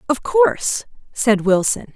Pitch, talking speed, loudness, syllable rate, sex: 245 Hz, 125 wpm, -18 LUFS, 4.1 syllables/s, female